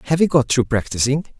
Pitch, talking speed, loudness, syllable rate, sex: 135 Hz, 215 wpm, -18 LUFS, 6.4 syllables/s, male